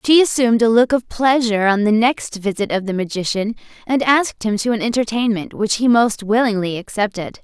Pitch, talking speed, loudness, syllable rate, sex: 225 Hz, 195 wpm, -17 LUFS, 5.6 syllables/s, female